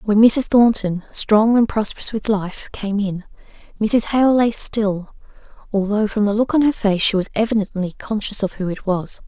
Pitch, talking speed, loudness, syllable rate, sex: 210 Hz, 190 wpm, -18 LUFS, 4.7 syllables/s, female